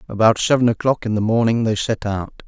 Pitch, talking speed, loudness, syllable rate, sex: 110 Hz, 220 wpm, -18 LUFS, 5.7 syllables/s, male